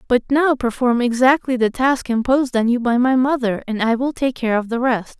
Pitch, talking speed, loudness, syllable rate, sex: 245 Hz, 230 wpm, -18 LUFS, 5.3 syllables/s, female